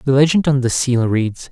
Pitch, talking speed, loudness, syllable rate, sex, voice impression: 130 Hz, 235 wpm, -16 LUFS, 5.1 syllables/s, male, very masculine, very adult-like, very thick, slightly relaxed, slightly weak, slightly bright, soft, slightly muffled, fluent, slightly raspy, cute, very intellectual, refreshing, sincere, very calm, slightly mature, very friendly, very reassuring, unique, elegant, slightly wild, sweet, slightly lively, kind, modest